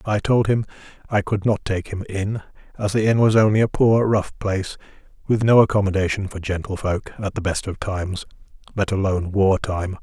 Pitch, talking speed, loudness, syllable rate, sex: 100 Hz, 190 wpm, -21 LUFS, 5.5 syllables/s, male